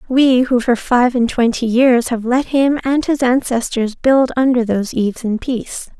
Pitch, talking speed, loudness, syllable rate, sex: 250 Hz, 190 wpm, -15 LUFS, 4.6 syllables/s, female